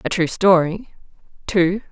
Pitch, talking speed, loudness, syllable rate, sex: 180 Hz, 125 wpm, -18 LUFS, 4.1 syllables/s, female